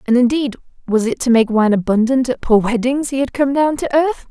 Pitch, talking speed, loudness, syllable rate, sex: 250 Hz, 235 wpm, -16 LUFS, 5.6 syllables/s, female